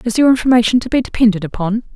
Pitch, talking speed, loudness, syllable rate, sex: 230 Hz, 215 wpm, -14 LUFS, 7.4 syllables/s, female